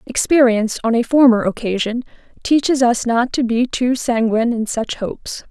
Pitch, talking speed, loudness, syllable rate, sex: 240 Hz, 165 wpm, -17 LUFS, 5.1 syllables/s, female